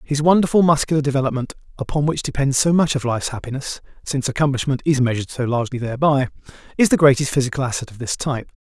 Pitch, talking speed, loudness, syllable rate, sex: 135 Hz, 175 wpm, -19 LUFS, 7.2 syllables/s, male